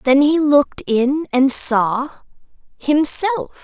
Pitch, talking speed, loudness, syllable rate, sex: 280 Hz, 100 wpm, -16 LUFS, 3.6 syllables/s, female